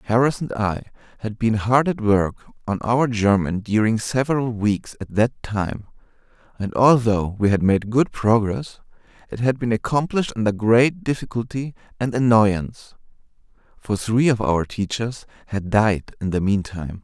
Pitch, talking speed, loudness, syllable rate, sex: 110 Hz, 155 wpm, -21 LUFS, 4.5 syllables/s, male